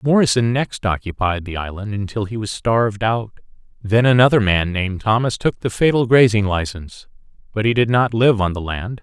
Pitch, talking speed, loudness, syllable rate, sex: 110 Hz, 185 wpm, -18 LUFS, 5.3 syllables/s, male